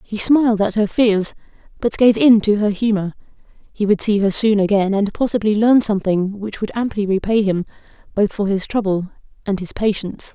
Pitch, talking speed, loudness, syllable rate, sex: 205 Hz, 190 wpm, -17 LUFS, 5.3 syllables/s, female